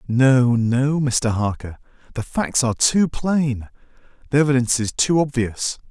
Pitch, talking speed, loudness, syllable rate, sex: 130 Hz, 110 wpm, -19 LUFS, 4.1 syllables/s, male